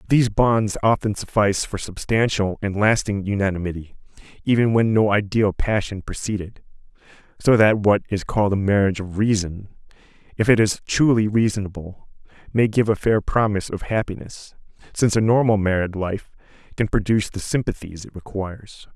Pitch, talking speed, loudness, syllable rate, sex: 105 Hz, 150 wpm, -21 LUFS, 5.4 syllables/s, male